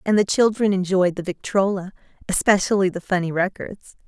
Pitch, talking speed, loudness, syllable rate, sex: 190 Hz, 145 wpm, -21 LUFS, 5.7 syllables/s, female